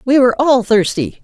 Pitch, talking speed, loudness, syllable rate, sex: 240 Hz, 195 wpm, -13 LUFS, 5.6 syllables/s, female